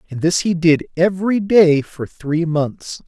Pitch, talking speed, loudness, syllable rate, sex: 165 Hz, 175 wpm, -16 LUFS, 4.0 syllables/s, male